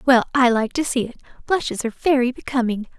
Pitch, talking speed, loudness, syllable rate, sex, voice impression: 250 Hz, 200 wpm, -20 LUFS, 6.3 syllables/s, female, very feminine, slightly young, thin, tensed, slightly powerful, bright, slightly soft, clear, fluent, slightly raspy, cute, intellectual, very refreshing, sincere, calm, friendly, very reassuring, unique, elegant, slightly wild, very sweet, very lively, kind, slightly sharp, light